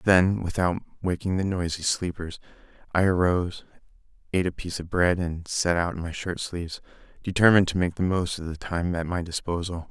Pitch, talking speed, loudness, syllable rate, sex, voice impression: 90 Hz, 190 wpm, -26 LUFS, 5.7 syllables/s, male, masculine, adult-like, relaxed, weak, muffled, halting, sincere, calm, friendly, reassuring, unique, modest